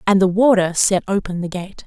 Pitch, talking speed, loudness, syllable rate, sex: 190 Hz, 225 wpm, -17 LUFS, 5.3 syllables/s, female